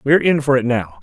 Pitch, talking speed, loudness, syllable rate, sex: 130 Hz, 295 wpm, -16 LUFS, 6.8 syllables/s, male